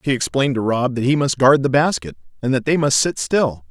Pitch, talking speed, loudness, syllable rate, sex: 130 Hz, 260 wpm, -18 LUFS, 5.7 syllables/s, male